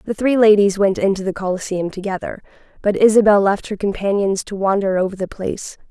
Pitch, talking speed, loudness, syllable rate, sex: 200 Hz, 185 wpm, -17 LUFS, 5.9 syllables/s, female